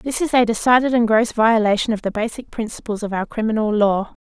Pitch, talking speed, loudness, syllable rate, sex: 225 Hz, 215 wpm, -18 LUFS, 5.8 syllables/s, female